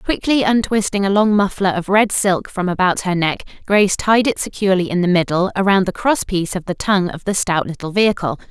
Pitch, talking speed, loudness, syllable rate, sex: 190 Hz, 220 wpm, -17 LUFS, 5.8 syllables/s, female